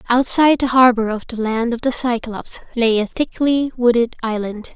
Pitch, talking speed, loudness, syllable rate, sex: 240 Hz, 175 wpm, -17 LUFS, 5.2 syllables/s, female